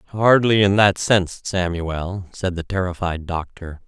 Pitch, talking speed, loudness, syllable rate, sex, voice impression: 95 Hz, 140 wpm, -20 LUFS, 4.3 syllables/s, male, very masculine, slightly young, slightly adult-like, slightly thick, very tensed, powerful, slightly bright, soft, very clear, fluent, cool, intellectual, very refreshing, sincere, calm, very friendly, very reassuring, slightly unique, elegant, slightly wild, very sweet, slightly lively, very kind, slightly modest